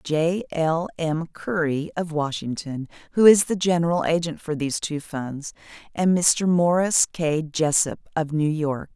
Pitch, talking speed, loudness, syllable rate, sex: 160 Hz, 155 wpm, -22 LUFS, 4.1 syllables/s, female